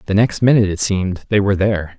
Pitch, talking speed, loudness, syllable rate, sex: 100 Hz, 240 wpm, -16 LUFS, 7.4 syllables/s, male